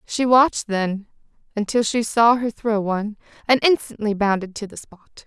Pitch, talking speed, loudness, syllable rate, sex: 220 Hz, 170 wpm, -20 LUFS, 4.9 syllables/s, female